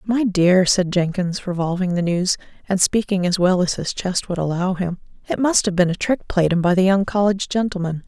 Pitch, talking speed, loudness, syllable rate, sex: 185 Hz, 225 wpm, -19 LUFS, 5.3 syllables/s, female